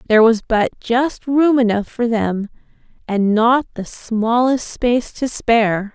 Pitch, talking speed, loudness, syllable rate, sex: 230 Hz, 150 wpm, -17 LUFS, 4.1 syllables/s, female